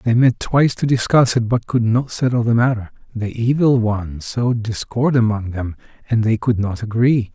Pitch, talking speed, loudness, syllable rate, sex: 115 Hz, 195 wpm, -18 LUFS, 5.1 syllables/s, male